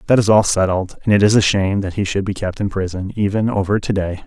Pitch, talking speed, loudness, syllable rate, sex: 100 Hz, 280 wpm, -17 LUFS, 6.2 syllables/s, male